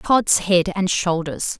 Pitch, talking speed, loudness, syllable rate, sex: 180 Hz, 150 wpm, -19 LUFS, 3.2 syllables/s, female